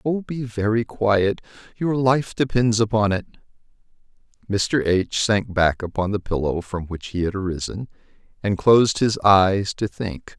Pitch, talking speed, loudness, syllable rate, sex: 105 Hz, 155 wpm, -21 LUFS, 4.3 syllables/s, male